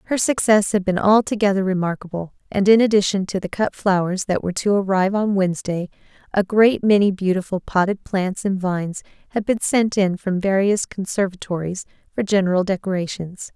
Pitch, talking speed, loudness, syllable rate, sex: 195 Hz, 165 wpm, -20 LUFS, 5.5 syllables/s, female